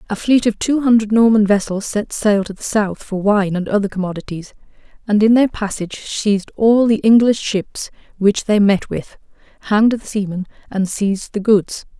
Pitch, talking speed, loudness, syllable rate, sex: 210 Hz, 185 wpm, -16 LUFS, 5.1 syllables/s, female